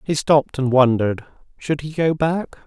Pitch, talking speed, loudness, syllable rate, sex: 145 Hz, 155 wpm, -19 LUFS, 5.1 syllables/s, male